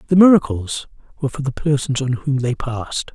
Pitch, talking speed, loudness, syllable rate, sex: 135 Hz, 190 wpm, -19 LUFS, 5.8 syllables/s, male